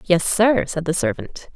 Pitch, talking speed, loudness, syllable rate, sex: 195 Hz, 195 wpm, -19 LUFS, 4.3 syllables/s, female